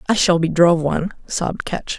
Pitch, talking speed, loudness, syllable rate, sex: 175 Hz, 210 wpm, -18 LUFS, 5.9 syllables/s, female